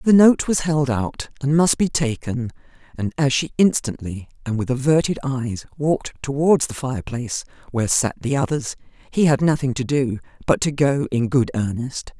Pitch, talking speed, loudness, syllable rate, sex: 135 Hz, 175 wpm, -21 LUFS, 5.0 syllables/s, female